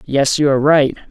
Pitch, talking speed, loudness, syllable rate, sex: 140 Hz, 220 wpm, -14 LUFS, 5.6 syllables/s, male